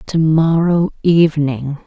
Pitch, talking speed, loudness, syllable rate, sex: 155 Hz, 95 wpm, -15 LUFS, 3.6 syllables/s, female